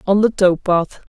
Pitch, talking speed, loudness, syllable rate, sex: 190 Hz, 215 wpm, -16 LUFS, 4.5 syllables/s, female